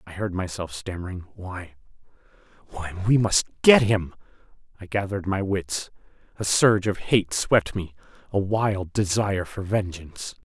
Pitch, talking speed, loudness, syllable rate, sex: 95 Hz, 135 wpm, -24 LUFS, 4.7 syllables/s, male